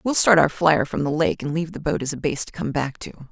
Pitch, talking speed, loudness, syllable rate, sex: 155 Hz, 325 wpm, -21 LUFS, 5.9 syllables/s, female